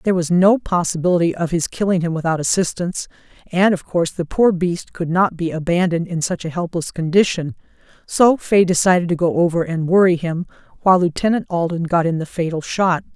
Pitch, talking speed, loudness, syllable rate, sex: 175 Hz, 190 wpm, -18 LUFS, 5.8 syllables/s, female